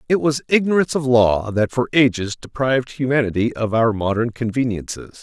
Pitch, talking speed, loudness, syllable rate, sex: 120 Hz, 160 wpm, -19 LUFS, 5.5 syllables/s, male